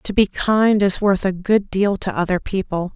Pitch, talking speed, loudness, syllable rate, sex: 195 Hz, 225 wpm, -18 LUFS, 4.5 syllables/s, female